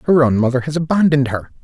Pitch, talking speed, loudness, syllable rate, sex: 140 Hz, 220 wpm, -16 LUFS, 7.2 syllables/s, male